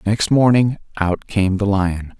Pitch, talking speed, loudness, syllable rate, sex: 100 Hz, 165 wpm, -17 LUFS, 3.8 syllables/s, male